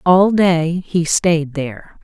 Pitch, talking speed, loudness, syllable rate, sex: 170 Hz, 145 wpm, -16 LUFS, 3.2 syllables/s, female